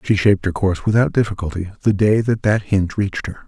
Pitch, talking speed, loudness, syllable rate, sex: 100 Hz, 225 wpm, -18 LUFS, 6.2 syllables/s, male